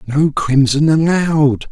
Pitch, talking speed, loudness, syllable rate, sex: 145 Hz, 105 wpm, -14 LUFS, 3.9 syllables/s, male